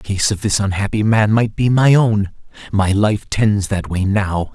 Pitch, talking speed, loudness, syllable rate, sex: 105 Hz, 210 wpm, -16 LUFS, 4.4 syllables/s, male